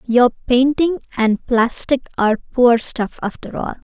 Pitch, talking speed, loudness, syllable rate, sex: 245 Hz, 140 wpm, -17 LUFS, 4.4 syllables/s, female